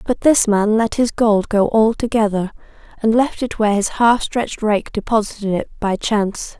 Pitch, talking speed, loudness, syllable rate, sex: 220 Hz, 190 wpm, -17 LUFS, 5.0 syllables/s, female